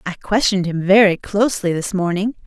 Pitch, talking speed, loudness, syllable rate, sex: 190 Hz, 170 wpm, -17 LUFS, 6.0 syllables/s, female